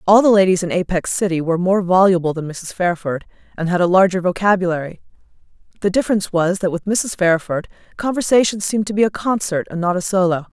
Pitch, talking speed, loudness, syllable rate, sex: 185 Hz, 195 wpm, -18 LUFS, 6.3 syllables/s, female